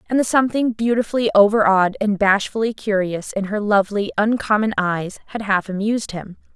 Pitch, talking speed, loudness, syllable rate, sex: 210 Hz, 165 wpm, -19 LUFS, 5.6 syllables/s, female